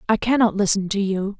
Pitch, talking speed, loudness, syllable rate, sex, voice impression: 205 Hz, 215 wpm, -20 LUFS, 5.8 syllables/s, female, feminine, adult-like, tensed, soft, slightly clear, intellectual, calm, friendly, reassuring, elegant, kind, slightly modest